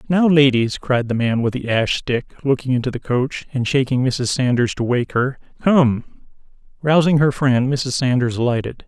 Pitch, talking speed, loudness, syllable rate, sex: 130 Hz, 185 wpm, -18 LUFS, 4.8 syllables/s, male